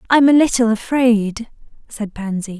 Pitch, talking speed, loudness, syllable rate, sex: 230 Hz, 140 wpm, -16 LUFS, 4.4 syllables/s, female